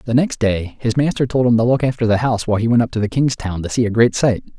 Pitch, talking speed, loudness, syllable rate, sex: 115 Hz, 325 wpm, -17 LUFS, 6.6 syllables/s, male